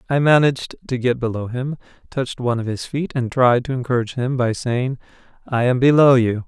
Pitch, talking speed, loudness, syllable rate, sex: 125 Hz, 205 wpm, -19 LUFS, 5.8 syllables/s, male